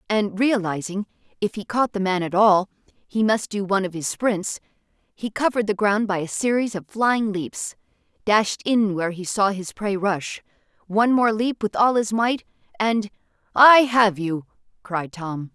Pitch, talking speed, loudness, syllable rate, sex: 205 Hz, 175 wpm, -21 LUFS, 4.6 syllables/s, female